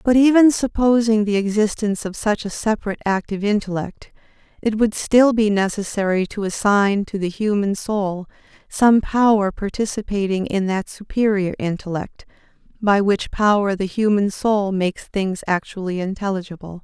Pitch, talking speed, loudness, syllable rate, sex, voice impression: 205 Hz, 140 wpm, -19 LUFS, 4.9 syllables/s, female, feminine, middle-aged, tensed, slightly soft, clear, intellectual, calm, friendly, reassuring, elegant, lively, kind